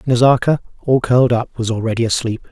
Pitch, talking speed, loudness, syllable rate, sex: 120 Hz, 165 wpm, -16 LUFS, 6.0 syllables/s, male